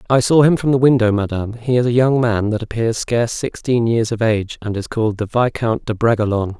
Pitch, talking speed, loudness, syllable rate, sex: 115 Hz, 235 wpm, -17 LUFS, 6.0 syllables/s, male